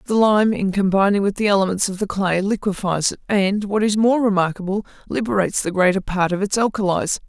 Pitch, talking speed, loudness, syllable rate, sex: 200 Hz, 200 wpm, -19 LUFS, 5.8 syllables/s, female